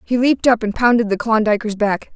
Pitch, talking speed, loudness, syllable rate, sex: 225 Hz, 220 wpm, -17 LUFS, 5.9 syllables/s, female